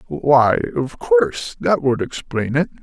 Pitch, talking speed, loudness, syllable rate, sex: 125 Hz, 150 wpm, -18 LUFS, 3.9 syllables/s, male